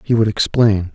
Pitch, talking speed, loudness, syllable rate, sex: 105 Hz, 190 wpm, -16 LUFS, 4.7 syllables/s, male